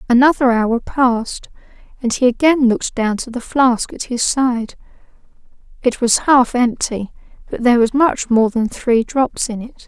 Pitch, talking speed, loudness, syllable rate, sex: 245 Hz, 170 wpm, -16 LUFS, 4.5 syllables/s, female